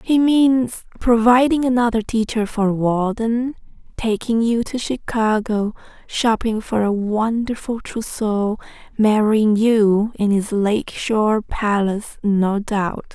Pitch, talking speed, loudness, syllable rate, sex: 220 Hz, 115 wpm, -19 LUFS, 3.6 syllables/s, female